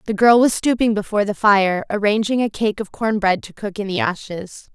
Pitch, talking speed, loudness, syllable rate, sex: 210 Hz, 230 wpm, -18 LUFS, 5.4 syllables/s, female